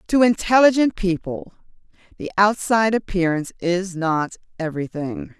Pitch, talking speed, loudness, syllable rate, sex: 190 Hz, 100 wpm, -20 LUFS, 5.1 syllables/s, female